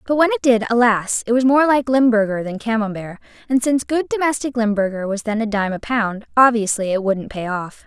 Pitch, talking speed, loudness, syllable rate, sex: 230 Hz, 215 wpm, -18 LUFS, 5.6 syllables/s, female